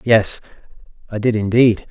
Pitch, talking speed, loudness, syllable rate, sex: 110 Hz, 125 wpm, -17 LUFS, 4.6 syllables/s, male